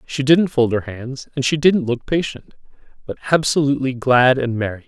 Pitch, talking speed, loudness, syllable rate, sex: 130 Hz, 185 wpm, -18 LUFS, 5.2 syllables/s, male